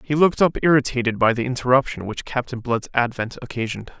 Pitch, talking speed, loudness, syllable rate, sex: 125 Hz, 180 wpm, -21 LUFS, 6.5 syllables/s, male